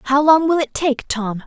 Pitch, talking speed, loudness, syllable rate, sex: 280 Hz, 245 wpm, -17 LUFS, 4.2 syllables/s, female